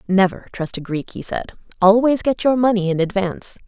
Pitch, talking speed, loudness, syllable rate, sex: 205 Hz, 195 wpm, -19 LUFS, 5.4 syllables/s, female